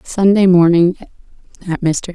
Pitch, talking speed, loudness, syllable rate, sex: 180 Hz, 110 wpm, -13 LUFS, 3.8 syllables/s, female